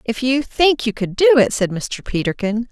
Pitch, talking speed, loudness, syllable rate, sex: 240 Hz, 220 wpm, -17 LUFS, 4.7 syllables/s, female